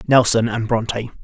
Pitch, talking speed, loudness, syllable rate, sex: 115 Hz, 145 wpm, -18 LUFS, 5.1 syllables/s, male